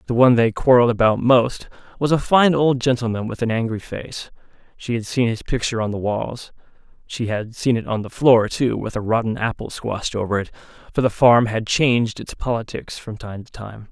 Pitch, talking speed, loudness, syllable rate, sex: 115 Hz, 205 wpm, -19 LUFS, 5.4 syllables/s, male